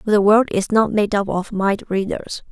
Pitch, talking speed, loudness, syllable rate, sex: 205 Hz, 240 wpm, -18 LUFS, 4.8 syllables/s, female